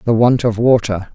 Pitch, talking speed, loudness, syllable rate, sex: 115 Hz, 210 wpm, -14 LUFS, 5.0 syllables/s, male